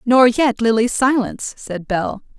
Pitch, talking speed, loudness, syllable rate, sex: 235 Hz, 150 wpm, -17 LUFS, 4.3 syllables/s, female